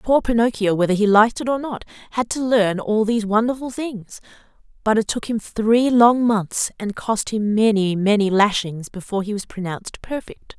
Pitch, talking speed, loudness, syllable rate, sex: 215 Hz, 185 wpm, -19 LUFS, 5.1 syllables/s, female